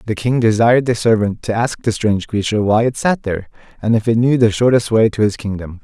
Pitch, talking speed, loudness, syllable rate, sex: 110 Hz, 245 wpm, -16 LUFS, 6.2 syllables/s, male